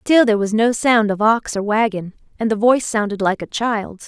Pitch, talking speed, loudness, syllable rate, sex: 220 Hz, 235 wpm, -17 LUFS, 5.3 syllables/s, female